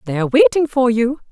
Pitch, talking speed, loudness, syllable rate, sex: 240 Hz, 230 wpm, -15 LUFS, 6.4 syllables/s, female